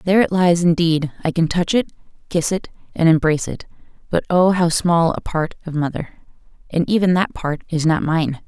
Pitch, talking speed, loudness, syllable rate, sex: 170 Hz, 200 wpm, -18 LUFS, 5.3 syllables/s, female